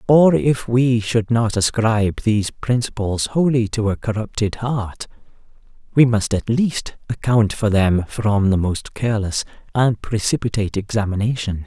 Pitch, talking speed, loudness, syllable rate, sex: 110 Hz, 140 wpm, -19 LUFS, 4.5 syllables/s, male